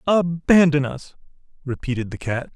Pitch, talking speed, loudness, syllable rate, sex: 150 Hz, 115 wpm, -20 LUFS, 4.8 syllables/s, male